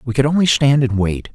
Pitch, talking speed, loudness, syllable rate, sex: 130 Hz, 270 wpm, -16 LUFS, 5.7 syllables/s, male